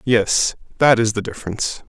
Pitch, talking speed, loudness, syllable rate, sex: 115 Hz, 155 wpm, -19 LUFS, 5.3 syllables/s, male